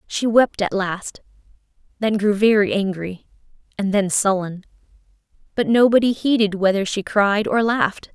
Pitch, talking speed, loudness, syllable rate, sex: 205 Hz, 140 wpm, -19 LUFS, 4.7 syllables/s, female